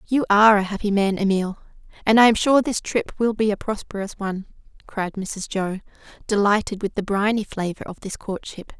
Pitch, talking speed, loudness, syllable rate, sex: 205 Hz, 185 wpm, -21 LUFS, 5.2 syllables/s, female